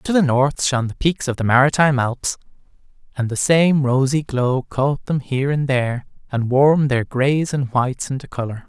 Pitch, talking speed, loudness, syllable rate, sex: 135 Hz, 195 wpm, -19 LUFS, 5.1 syllables/s, male